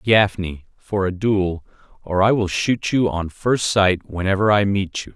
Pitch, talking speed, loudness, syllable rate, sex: 100 Hz, 185 wpm, -20 LUFS, 4.1 syllables/s, male